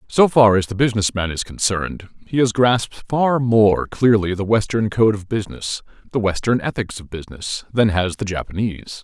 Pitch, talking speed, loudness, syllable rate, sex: 105 Hz, 185 wpm, -19 LUFS, 5.3 syllables/s, male